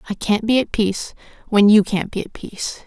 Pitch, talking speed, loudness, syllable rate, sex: 210 Hz, 230 wpm, -18 LUFS, 5.7 syllables/s, female